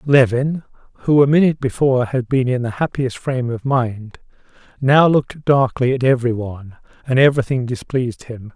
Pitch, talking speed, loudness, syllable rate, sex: 130 Hz, 155 wpm, -17 LUFS, 5.5 syllables/s, male